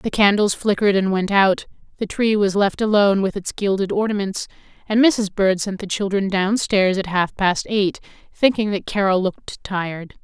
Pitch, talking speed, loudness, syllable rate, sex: 200 Hz, 190 wpm, -19 LUFS, 5.0 syllables/s, female